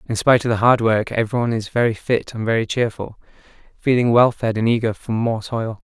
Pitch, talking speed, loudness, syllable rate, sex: 115 Hz, 215 wpm, -19 LUFS, 5.9 syllables/s, male